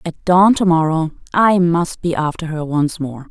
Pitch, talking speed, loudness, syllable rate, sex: 165 Hz, 200 wpm, -16 LUFS, 4.4 syllables/s, female